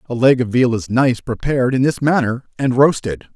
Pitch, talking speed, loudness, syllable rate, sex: 125 Hz, 215 wpm, -17 LUFS, 5.1 syllables/s, male